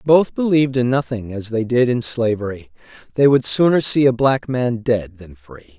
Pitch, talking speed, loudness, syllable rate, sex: 120 Hz, 195 wpm, -17 LUFS, 4.8 syllables/s, male